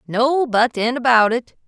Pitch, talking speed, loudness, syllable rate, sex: 240 Hz, 180 wpm, -17 LUFS, 4.1 syllables/s, female